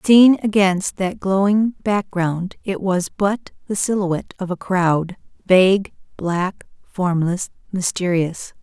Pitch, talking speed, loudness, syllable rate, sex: 190 Hz, 120 wpm, -19 LUFS, 3.7 syllables/s, female